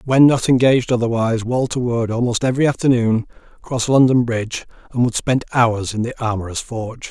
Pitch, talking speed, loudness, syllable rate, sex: 120 Hz, 170 wpm, -18 LUFS, 5.8 syllables/s, male